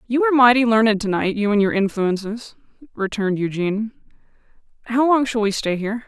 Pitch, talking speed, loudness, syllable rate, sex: 220 Hz, 180 wpm, -19 LUFS, 6.2 syllables/s, female